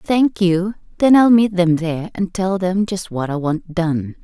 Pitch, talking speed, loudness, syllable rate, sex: 185 Hz, 210 wpm, -17 LUFS, 4.2 syllables/s, female